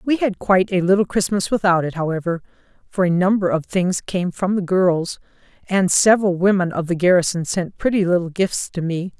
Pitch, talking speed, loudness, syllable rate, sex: 185 Hz, 195 wpm, -19 LUFS, 5.4 syllables/s, female